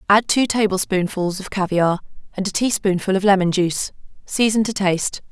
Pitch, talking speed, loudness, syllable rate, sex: 195 Hz, 160 wpm, -19 LUFS, 5.6 syllables/s, female